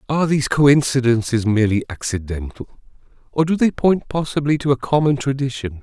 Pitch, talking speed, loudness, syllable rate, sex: 130 Hz, 145 wpm, -18 LUFS, 5.8 syllables/s, male